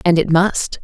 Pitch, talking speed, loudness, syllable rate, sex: 175 Hz, 215 wpm, -15 LUFS, 4.1 syllables/s, female